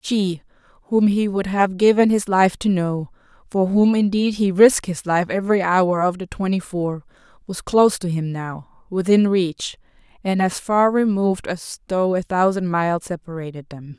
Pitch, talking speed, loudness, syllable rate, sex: 185 Hz, 170 wpm, -19 LUFS, 4.6 syllables/s, female